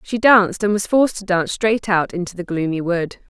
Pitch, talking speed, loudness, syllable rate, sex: 190 Hz, 230 wpm, -18 LUFS, 5.7 syllables/s, female